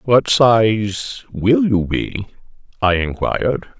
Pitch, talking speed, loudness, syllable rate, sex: 110 Hz, 110 wpm, -17 LUFS, 2.9 syllables/s, male